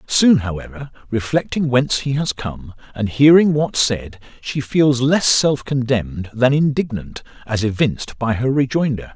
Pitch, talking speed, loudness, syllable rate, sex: 130 Hz, 150 wpm, -18 LUFS, 4.5 syllables/s, male